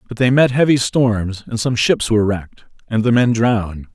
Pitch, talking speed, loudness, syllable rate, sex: 115 Hz, 215 wpm, -16 LUFS, 5.2 syllables/s, male